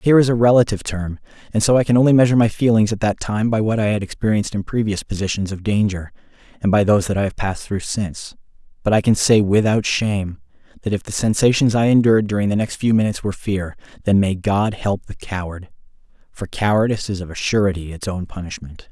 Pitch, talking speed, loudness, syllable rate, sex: 105 Hz, 220 wpm, -18 LUFS, 6.4 syllables/s, male